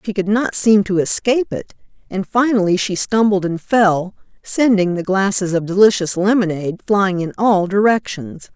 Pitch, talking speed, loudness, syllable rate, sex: 200 Hz, 160 wpm, -16 LUFS, 4.8 syllables/s, female